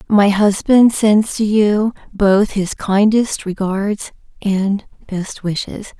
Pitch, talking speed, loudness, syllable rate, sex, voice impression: 205 Hz, 120 wpm, -16 LUFS, 3.2 syllables/s, female, feminine, adult-like, slightly soft, slightly calm, friendly, slightly kind